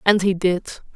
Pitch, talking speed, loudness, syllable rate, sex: 190 Hz, 190 wpm, -20 LUFS, 5.1 syllables/s, female